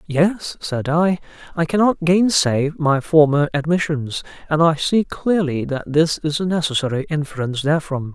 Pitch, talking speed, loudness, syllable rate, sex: 155 Hz, 145 wpm, -19 LUFS, 4.7 syllables/s, male